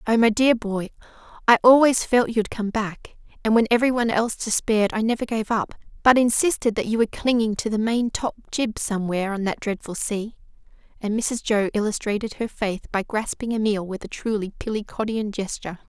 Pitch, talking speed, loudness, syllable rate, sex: 220 Hz, 185 wpm, -22 LUFS, 5.4 syllables/s, female